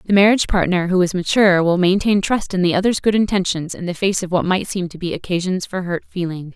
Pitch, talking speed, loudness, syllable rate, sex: 185 Hz, 245 wpm, -18 LUFS, 6.1 syllables/s, female